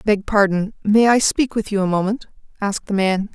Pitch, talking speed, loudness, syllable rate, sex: 205 Hz, 215 wpm, -18 LUFS, 5.3 syllables/s, female